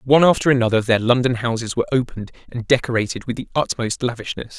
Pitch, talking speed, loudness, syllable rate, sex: 120 Hz, 185 wpm, -19 LUFS, 6.9 syllables/s, male